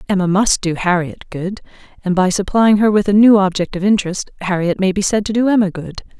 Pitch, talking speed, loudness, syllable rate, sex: 195 Hz, 225 wpm, -15 LUFS, 6.0 syllables/s, female